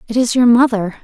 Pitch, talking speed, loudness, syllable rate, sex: 235 Hz, 235 wpm, -13 LUFS, 5.8 syllables/s, female